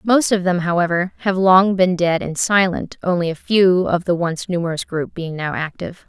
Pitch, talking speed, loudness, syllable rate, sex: 180 Hz, 205 wpm, -18 LUFS, 5.0 syllables/s, female